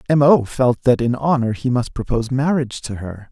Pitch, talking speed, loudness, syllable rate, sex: 125 Hz, 215 wpm, -18 LUFS, 5.4 syllables/s, male